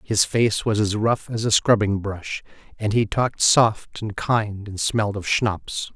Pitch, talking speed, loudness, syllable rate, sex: 105 Hz, 190 wpm, -21 LUFS, 4.0 syllables/s, male